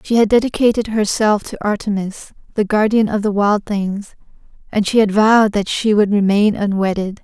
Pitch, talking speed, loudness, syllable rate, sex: 210 Hz, 175 wpm, -16 LUFS, 5.1 syllables/s, female